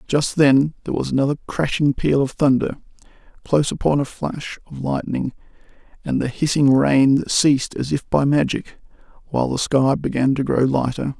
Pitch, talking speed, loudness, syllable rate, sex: 140 Hz, 165 wpm, -19 LUFS, 5.0 syllables/s, male